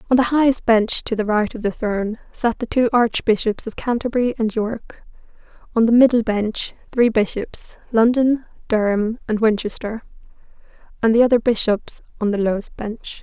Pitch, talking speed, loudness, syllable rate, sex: 225 Hz, 165 wpm, -19 LUFS, 5.0 syllables/s, female